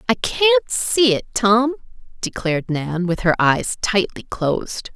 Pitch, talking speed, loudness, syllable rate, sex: 220 Hz, 145 wpm, -19 LUFS, 3.8 syllables/s, female